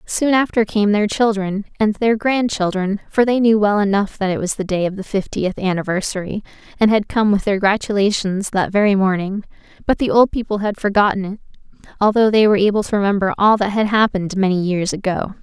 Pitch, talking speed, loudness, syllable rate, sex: 205 Hz, 200 wpm, -17 LUFS, 5.7 syllables/s, female